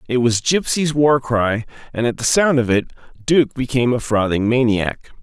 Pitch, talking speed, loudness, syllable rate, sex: 125 Hz, 185 wpm, -17 LUFS, 5.1 syllables/s, male